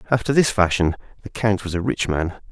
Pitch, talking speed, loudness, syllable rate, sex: 100 Hz, 215 wpm, -21 LUFS, 5.8 syllables/s, male